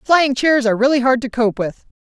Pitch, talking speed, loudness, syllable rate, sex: 255 Hz, 235 wpm, -16 LUFS, 5.6 syllables/s, female